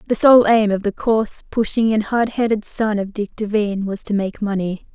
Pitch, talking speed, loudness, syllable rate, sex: 210 Hz, 220 wpm, -18 LUFS, 5.2 syllables/s, female